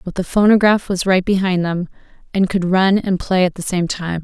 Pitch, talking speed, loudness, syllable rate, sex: 185 Hz, 225 wpm, -17 LUFS, 5.2 syllables/s, female